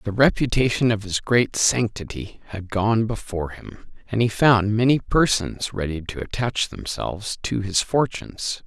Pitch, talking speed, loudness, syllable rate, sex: 110 Hz, 150 wpm, -22 LUFS, 4.6 syllables/s, male